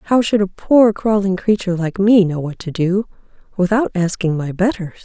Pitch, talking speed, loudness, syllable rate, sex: 195 Hz, 190 wpm, -17 LUFS, 5.2 syllables/s, female